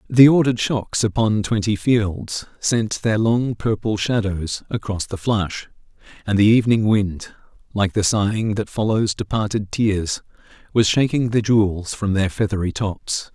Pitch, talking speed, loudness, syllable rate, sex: 105 Hz, 150 wpm, -20 LUFS, 4.3 syllables/s, male